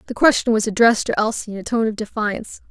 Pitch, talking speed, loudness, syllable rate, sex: 220 Hz, 245 wpm, -19 LUFS, 7.0 syllables/s, female